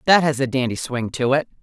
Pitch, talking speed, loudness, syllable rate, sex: 135 Hz, 260 wpm, -20 LUFS, 5.8 syllables/s, female